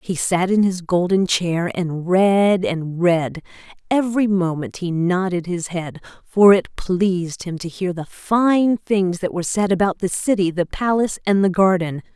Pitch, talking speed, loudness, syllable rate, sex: 185 Hz, 180 wpm, -19 LUFS, 4.3 syllables/s, female